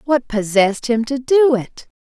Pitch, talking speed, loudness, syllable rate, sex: 250 Hz, 175 wpm, -17 LUFS, 4.5 syllables/s, female